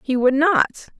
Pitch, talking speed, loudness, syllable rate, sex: 280 Hz, 180 wpm, -18 LUFS, 5.1 syllables/s, female